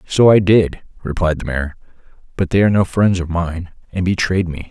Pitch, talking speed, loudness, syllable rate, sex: 90 Hz, 205 wpm, -16 LUFS, 5.3 syllables/s, male